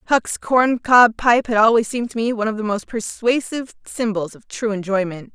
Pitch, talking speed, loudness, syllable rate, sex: 225 Hz, 190 wpm, -18 LUFS, 5.4 syllables/s, female